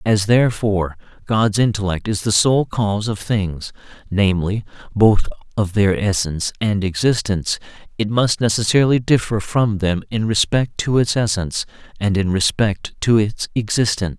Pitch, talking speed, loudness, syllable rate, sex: 105 Hz, 145 wpm, -18 LUFS, 5.0 syllables/s, male